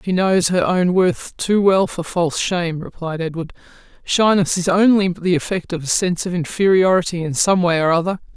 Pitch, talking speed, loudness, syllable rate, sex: 180 Hz, 195 wpm, -18 LUFS, 5.2 syllables/s, female